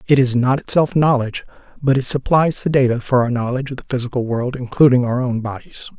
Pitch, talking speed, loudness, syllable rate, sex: 130 Hz, 210 wpm, -17 LUFS, 6.2 syllables/s, male